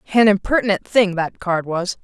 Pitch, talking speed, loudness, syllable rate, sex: 195 Hz, 175 wpm, -18 LUFS, 5.2 syllables/s, female